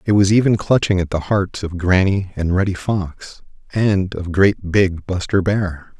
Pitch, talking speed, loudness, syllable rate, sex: 95 Hz, 180 wpm, -18 LUFS, 4.2 syllables/s, male